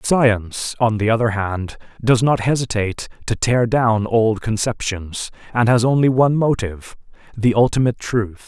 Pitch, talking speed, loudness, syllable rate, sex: 115 Hz, 150 wpm, -18 LUFS, 4.8 syllables/s, male